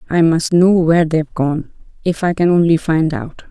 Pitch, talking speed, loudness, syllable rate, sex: 165 Hz, 190 wpm, -15 LUFS, 5.1 syllables/s, female